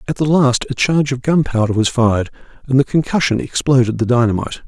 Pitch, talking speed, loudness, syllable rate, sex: 130 Hz, 195 wpm, -16 LUFS, 6.6 syllables/s, male